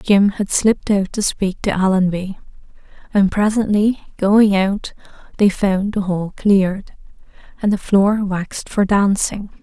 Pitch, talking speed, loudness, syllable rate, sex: 200 Hz, 145 wpm, -17 LUFS, 4.1 syllables/s, female